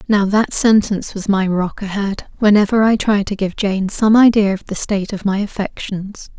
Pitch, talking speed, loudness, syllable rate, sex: 200 Hz, 195 wpm, -16 LUFS, 4.9 syllables/s, female